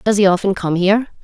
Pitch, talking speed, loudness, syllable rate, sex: 195 Hz, 245 wpm, -16 LUFS, 6.6 syllables/s, female